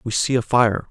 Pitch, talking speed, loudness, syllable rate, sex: 115 Hz, 265 wpm, -19 LUFS, 5.1 syllables/s, male